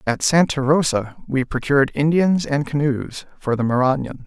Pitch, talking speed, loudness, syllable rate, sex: 140 Hz, 155 wpm, -19 LUFS, 4.9 syllables/s, male